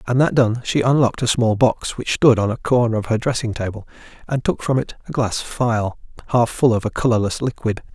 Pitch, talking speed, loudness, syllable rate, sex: 115 Hz, 225 wpm, -19 LUFS, 5.6 syllables/s, male